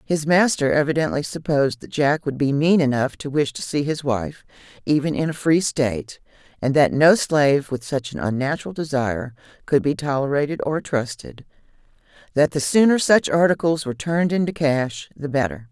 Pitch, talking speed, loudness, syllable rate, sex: 150 Hz, 175 wpm, -20 LUFS, 5.3 syllables/s, female